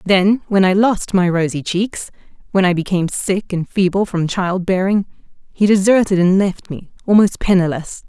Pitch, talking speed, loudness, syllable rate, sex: 190 Hz, 155 wpm, -16 LUFS, 4.8 syllables/s, female